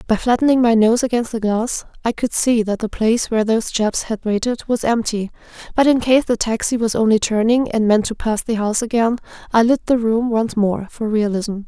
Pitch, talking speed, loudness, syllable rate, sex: 225 Hz, 220 wpm, -18 LUFS, 5.5 syllables/s, female